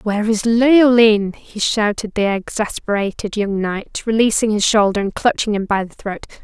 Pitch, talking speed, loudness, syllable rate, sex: 210 Hz, 160 wpm, -17 LUFS, 4.8 syllables/s, female